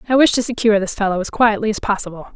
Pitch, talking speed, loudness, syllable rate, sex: 210 Hz, 255 wpm, -17 LUFS, 7.5 syllables/s, female